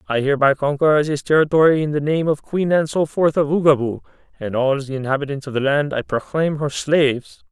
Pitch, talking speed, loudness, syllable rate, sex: 145 Hz, 200 wpm, -19 LUFS, 5.6 syllables/s, male